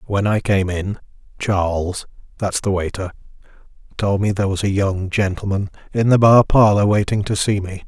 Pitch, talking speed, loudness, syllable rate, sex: 100 Hz, 160 wpm, -18 LUFS, 5.1 syllables/s, male